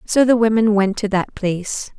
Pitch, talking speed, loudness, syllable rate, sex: 210 Hz, 210 wpm, -17 LUFS, 4.9 syllables/s, female